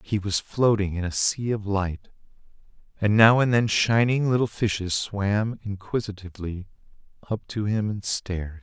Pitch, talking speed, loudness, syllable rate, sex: 105 Hz, 155 wpm, -24 LUFS, 4.7 syllables/s, male